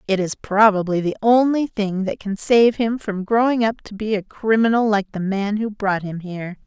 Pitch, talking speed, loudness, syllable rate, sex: 210 Hz, 215 wpm, -19 LUFS, 4.9 syllables/s, female